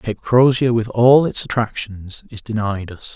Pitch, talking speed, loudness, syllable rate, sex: 115 Hz, 170 wpm, -17 LUFS, 4.3 syllables/s, male